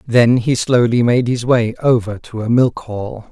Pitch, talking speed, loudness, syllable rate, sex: 115 Hz, 200 wpm, -15 LUFS, 4.2 syllables/s, male